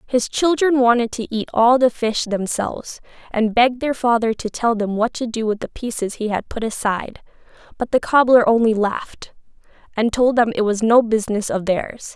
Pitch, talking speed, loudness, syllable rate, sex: 230 Hz, 195 wpm, -19 LUFS, 5.2 syllables/s, female